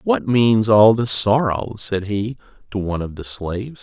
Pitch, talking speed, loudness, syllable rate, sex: 110 Hz, 190 wpm, -18 LUFS, 4.5 syllables/s, male